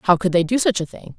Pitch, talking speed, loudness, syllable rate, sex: 190 Hz, 355 wpm, -19 LUFS, 6.1 syllables/s, female